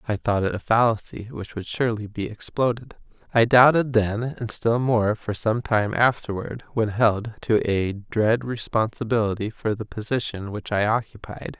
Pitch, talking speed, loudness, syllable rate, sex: 110 Hz, 165 wpm, -23 LUFS, 4.6 syllables/s, male